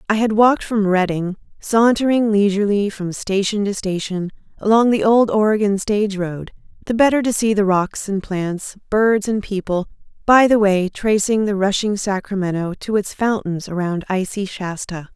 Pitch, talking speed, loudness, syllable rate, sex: 205 Hz, 160 wpm, -18 LUFS, 4.8 syllables/s, female